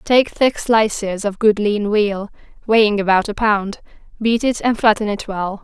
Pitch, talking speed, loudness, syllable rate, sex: 210 Hz, 180 wpm, -17 LUFS, 4.4 syllables/s, female